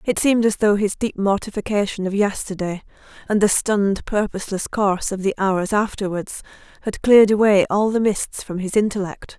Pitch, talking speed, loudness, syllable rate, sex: 200 Hz, 175 wpm, -20 LUFS, 5.4 syllables/s, female